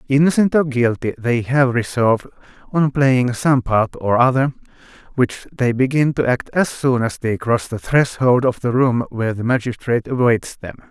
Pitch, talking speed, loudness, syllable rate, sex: 125 Hz, 175 wpm, -18 LUFS, 4.8 syllables/s, male